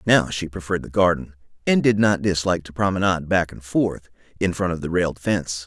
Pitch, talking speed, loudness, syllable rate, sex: 90 Hz, 210 wpm, -22 LUFS, 6.1 syllables/s, male